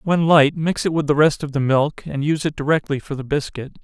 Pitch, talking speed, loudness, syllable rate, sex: 150 Hz, 265 wpm, -19 LUFS, 5.8 syllables/s, male